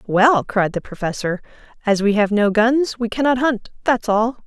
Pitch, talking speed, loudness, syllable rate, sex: 225 Hz, 190 wpm, -18 LUFS, 4.6 syllables/s, female